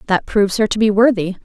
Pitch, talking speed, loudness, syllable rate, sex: 205 Hz, 250 wpm, -15 LUFS, 6.7 syllables/s, female